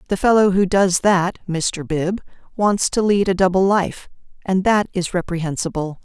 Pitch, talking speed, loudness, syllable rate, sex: 185 Hz, 170 wpm, -18 LUFS, 4.6 syllables/s, female